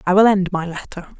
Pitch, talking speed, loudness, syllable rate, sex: 185 Hz, 250 wpm, -17 LUFS, 6.1 syllables/s, female